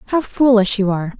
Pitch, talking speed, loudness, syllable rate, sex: 220 Hz, 200 wpm, -16 LUFS, 5.4 syllables/s, female